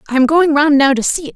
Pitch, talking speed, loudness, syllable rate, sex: 290 Hz, 355 wpm, -12 LUFS, 7.0 syllables/s, female